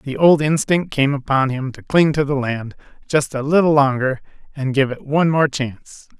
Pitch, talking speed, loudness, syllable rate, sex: 140 Hz, 205 wpm, -18 LUFS, 5.0 syllables/s, male